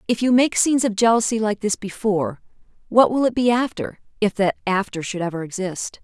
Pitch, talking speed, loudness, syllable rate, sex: 215 Hz, 200 wpm, -20 LUFS, 5.7 syllables/s, female